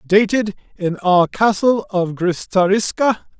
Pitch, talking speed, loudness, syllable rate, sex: 195 Hz, 105 wpm, -17 LUFS, 3.9 syllables/s, male